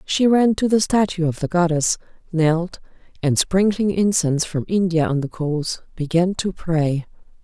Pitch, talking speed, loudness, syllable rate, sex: 175 Hz, 160 wpm, -20 LUFS, 4.6 syllables/s, female